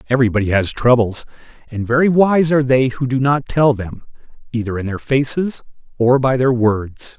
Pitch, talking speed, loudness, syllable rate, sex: 125 Hz, 175 wpm, -16 LUFS, 5.2 syllables/s, male